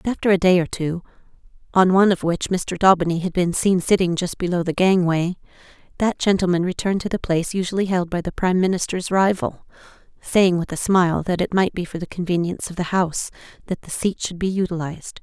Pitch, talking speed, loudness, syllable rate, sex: 180 Hz, 200 wpm, -20 LUFS, 6.1 syllables/s, female